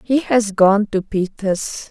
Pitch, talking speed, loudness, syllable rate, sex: 205 Hz, 160 wpm, -17 LUFS, 3.3 syllables/s, female